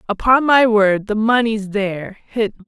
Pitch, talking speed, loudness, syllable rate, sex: 215 Hz, 155 wpm, -16 LUFS, 4.6 syllables/s, female